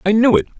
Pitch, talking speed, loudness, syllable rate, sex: 200 Hz, 300 wpm, -14 LUFS, 7.9 syllables/s, male